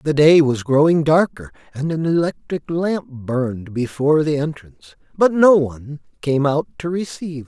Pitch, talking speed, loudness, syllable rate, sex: 150 Hz, 170 wpm, -18 LUFS, 5.1 syllables/s, male